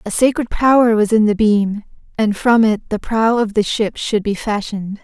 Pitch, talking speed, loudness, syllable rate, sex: 215 Hz, 215 wpm, -16 LUFS, 4.9 syllables/s, female